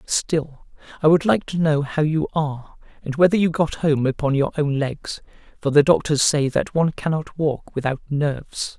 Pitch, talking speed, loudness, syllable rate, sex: 150 Hz, 190 wpm, -21 LUFS, 4.8 syllables/s, male